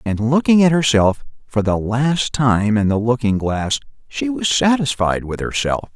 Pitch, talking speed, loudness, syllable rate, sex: 125 Hz, 170 wpm, -17 LUFS, 4.3 syllables/s, male